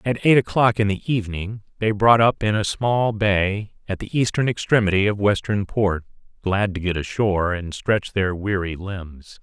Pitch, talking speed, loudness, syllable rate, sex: 100 Hz, 185 wpm, -21 LUFS, 4.6 syllables/s, male